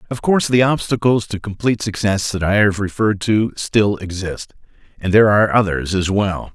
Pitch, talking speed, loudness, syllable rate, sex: 105 Hz, 185 wpm, -17 LUFS, 5.5 syllables/s, male